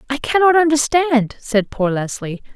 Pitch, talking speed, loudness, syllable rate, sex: 265 Hz, 140 wpm, -17 LUFS, 4.5 syllables/s, female